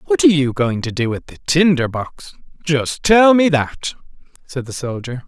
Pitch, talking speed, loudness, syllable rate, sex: 150 Hz, 195 wpm, -17 LUFS, 4.6 syllables/s, male